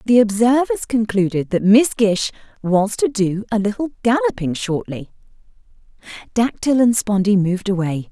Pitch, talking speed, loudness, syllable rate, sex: 215 Hz, 135 wpm, -18 LUFS, 4.8 syllables/s, female